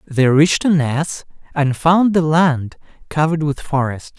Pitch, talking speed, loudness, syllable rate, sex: 150 Hz, 160 wpm, -16 LUFS, 4.4 syllables/s, male